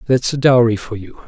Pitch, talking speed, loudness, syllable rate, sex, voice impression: 120 Hz, 235 wpm, -15 LUFS, 5.6 syllables/s, male, masculine, middle-aged, thick, tensed, powerful, soft, cool, intellectual, slightly friendly, wild, lively, slightly kind